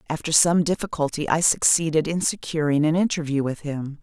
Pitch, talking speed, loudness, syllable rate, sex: 160 Hz, 165 wpm, -21 LUFS, 5.5 syllables/s, female